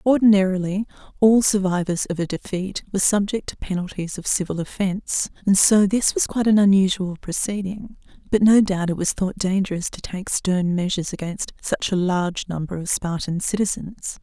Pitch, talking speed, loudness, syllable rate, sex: 190 Hz, 170 wpm, -21 LUFS, 5.3 syllables/s, female